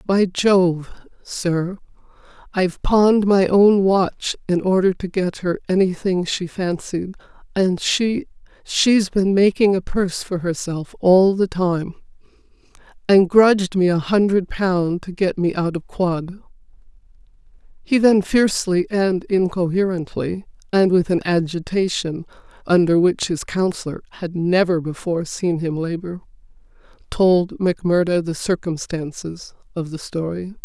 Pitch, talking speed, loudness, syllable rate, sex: 180 Hz, 130 wpm, -19 LUFS, 4.2 syllables/s, female